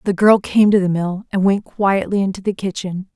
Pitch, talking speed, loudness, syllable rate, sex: 195 Hz, 230 wpm, -17 LUFS, 5.1 syllables/s, female